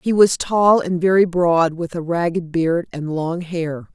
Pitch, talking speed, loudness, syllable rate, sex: 170 Hz, 200 wpm, -18 LUFS, 3.9 syllables/s, female